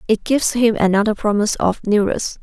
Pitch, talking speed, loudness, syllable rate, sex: 215 Hz, 175 wpm, -17 LUFS, 6.0 syllables/s, female